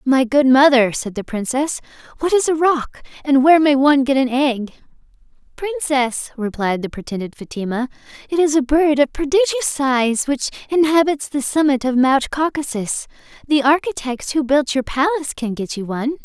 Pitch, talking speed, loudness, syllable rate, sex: 275 Hz, 170 wpm, -18 LUFS, 5.1 syllables/s, female